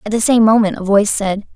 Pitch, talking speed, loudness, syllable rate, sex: 210 Hz, 270 wpm, -14 LUFS, 6.4 syllables/s, female